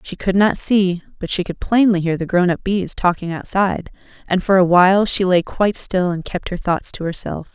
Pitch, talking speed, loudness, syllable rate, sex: 185 Hz, 230 wpm, -18 LUFS, 5.2 syllables/s, female